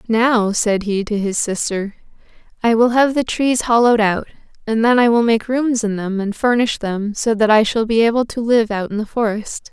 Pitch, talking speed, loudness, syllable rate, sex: 225 Hz, 220 wpm, -17 LUFS, 5.0 syllables/s, female